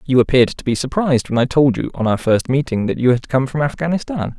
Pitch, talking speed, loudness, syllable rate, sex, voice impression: 135 Hz, 260 wpm, -17 LUFS, 6.4 syllables/s, male, very masculine, very adult-like, very thick, tensed, slightly powerful, bright, soft, slightly muffled, fluent, slightly raspy, cool, very intellectual, refreshing, sincere, very calm, mature, friendly, very reassuring, unique, elegant, wild, very sweet, lively, kind, slightly modest